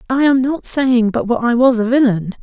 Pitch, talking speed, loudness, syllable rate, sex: 245 Hz, 245 wpm, -14 LUFS, 5.1 syllables/s, female